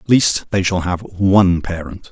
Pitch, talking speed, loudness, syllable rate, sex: 95 Hz, 200 wpm, -16 LUFS, 4.7 syllables/s, male